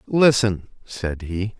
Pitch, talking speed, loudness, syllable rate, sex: 105 Hz, 115 wpm, -21 LUFS, 3.1 syllables/s, male